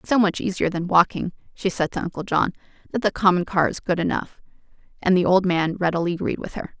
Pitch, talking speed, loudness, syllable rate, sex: 180 Hz, 230 wpm, -22 LUFS, 6.2 syllables/s, female